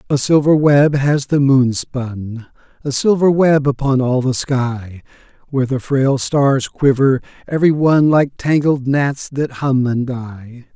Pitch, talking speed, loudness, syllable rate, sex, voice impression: 135 Hz, 155 wpm, -15 LUFS, 3.9 syllables/s, male, masculine, adult-like, slightly thick, tensed, powerful, soft, raspy, cool, calm, mature, slightly friendly, wild, lively, slightly strict